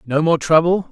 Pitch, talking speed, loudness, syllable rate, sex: 160 Hz, 195 wpm, -15 LUFS, 4.9 syllables/s, male